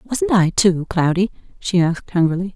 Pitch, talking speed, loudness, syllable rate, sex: 190 Hz, 165 wpm, -18 LUFS, 5.0 syllables/s, female